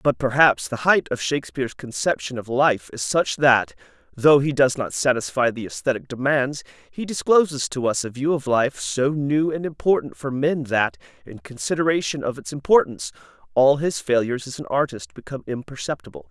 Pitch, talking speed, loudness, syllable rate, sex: 130 Hz, 175 wpm, -21 LUFS, 5.3 syllables/s, male